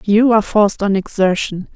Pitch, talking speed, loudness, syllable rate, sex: 205 Hz, 170 wpm, -15 LUFS, 5.6 syllables/s, female